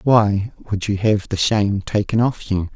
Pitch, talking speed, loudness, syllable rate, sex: 105 Hz, 195 wpm, -19 LUFS, 4.3 syllables/s, male